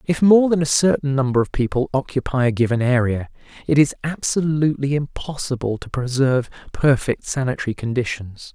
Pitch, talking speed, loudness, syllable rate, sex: 135 Hz, 150 wpm, -20 LUFS, 5.6 syllables/s, male